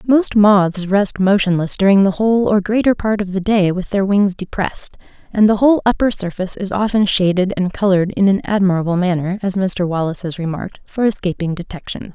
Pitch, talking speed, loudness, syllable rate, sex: 195 Hz, 195 wpm, -16 LUFS, 5.7 syllables/s, female